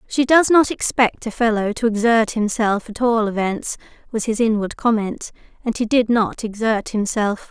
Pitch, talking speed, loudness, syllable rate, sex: 225 Hz, 175 wpm, -19 LUFS, 4.6 syllables/s, female